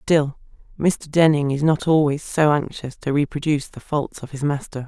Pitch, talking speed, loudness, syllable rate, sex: 145 Hz, 185 wpm, -21 LUFS, 4.9 syllables/s, female